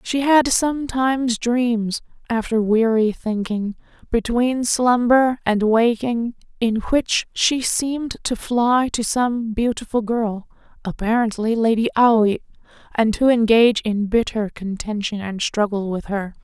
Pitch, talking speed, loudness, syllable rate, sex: 230 Hz, 125 wpm, -19 LUFS, 4.0 syllables/s, female